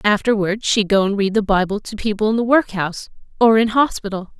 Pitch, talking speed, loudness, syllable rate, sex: 210 Hz, 205 wpm, -18 LUFS, 5.8 syllables/s, female